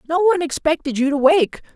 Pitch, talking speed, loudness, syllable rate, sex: 270 Hz, 205 wpm, -18 LUFS, 6.0 syllables/s, male